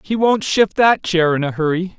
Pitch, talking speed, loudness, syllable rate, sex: 185 Hz, 240 wpm, -16 LUFS, 4.8 syllables/s, male